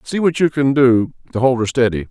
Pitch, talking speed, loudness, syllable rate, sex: 130 Hz, 255 wpm, -16 LUFS, 5.5 syllables/s, male